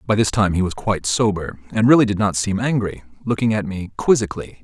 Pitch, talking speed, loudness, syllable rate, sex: 105 Hz, 220 wpm, -19 LUFS, 6.1 syllables/s, male